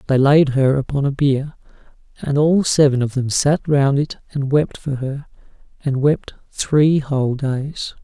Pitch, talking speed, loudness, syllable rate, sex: 140 Hz, 170 wpm, -18 LUFS, 4.1 syllables/s, male